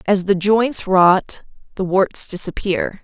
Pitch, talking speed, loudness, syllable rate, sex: 190 Hz, 140 wpm, -17 LUFS, 3.5 syllables/s, female